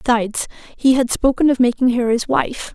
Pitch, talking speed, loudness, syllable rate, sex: 245 Hz, 195 wpm, -17 LUFS, 5.5 syllables/s, female